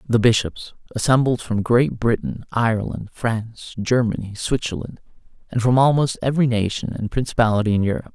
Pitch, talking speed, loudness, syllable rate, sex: 115 Hz, 140 wpm, -20 LUFS, 5.6 syllables/s, male